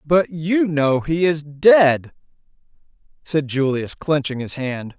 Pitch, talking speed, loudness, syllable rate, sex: 150 Hz, 130 wpm, -19 LUFS, 3.4 syllables/s, male